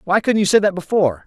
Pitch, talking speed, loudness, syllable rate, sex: 185 Hz, 285 wpm, -17 LUFS, 7.0 syllables/s, male